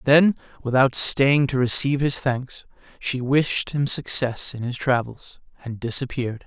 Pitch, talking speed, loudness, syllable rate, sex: 130 Hz, 150 wpm, -21 LUFS, 4.4 syllables/s, male